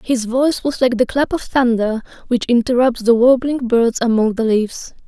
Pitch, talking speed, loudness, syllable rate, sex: 240 Hz, 190 wpm, -16 LUFS, 5.0 syllables/s, female